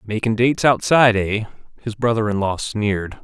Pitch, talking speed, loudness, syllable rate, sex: 110 Hz, 165 wpm, -18 LUFS, 5.4 syllables/s, male